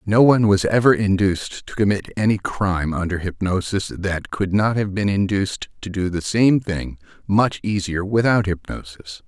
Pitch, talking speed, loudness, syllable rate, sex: 100 Hz, 170 wpm, -20 LUFS, 4.9 syllables/s, male